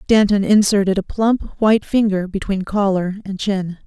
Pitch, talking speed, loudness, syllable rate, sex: 200 Hz, 155 wpm, -17 LUFS, 4.9 syllables/s, female